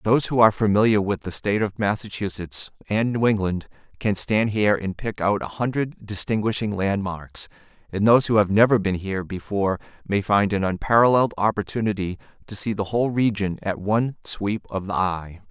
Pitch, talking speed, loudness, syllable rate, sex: 105 Hz, 170 wpm, -22 LUFS, 5.6 syllables/s, male